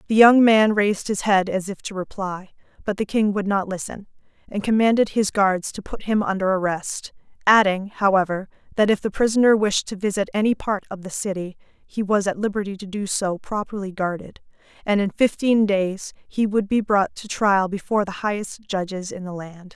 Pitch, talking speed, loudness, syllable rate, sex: 200 Hz, 195 wpm, -21 LUFS, 5.2 syllables/s, female